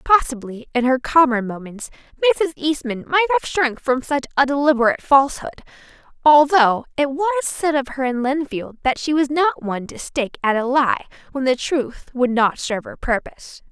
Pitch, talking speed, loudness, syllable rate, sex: 270 Hz, 180 wpm, -19 LUFS, 5.4 syllables/s, female